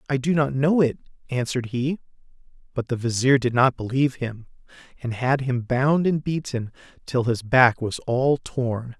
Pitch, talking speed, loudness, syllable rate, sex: 130 Hz, 175 wpm, -23 LUFS, 4.7 syllables/s, male